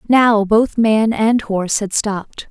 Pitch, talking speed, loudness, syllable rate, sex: 215 Hz, 170 wpm, -15 LUFS, 3.8 syllables/s, female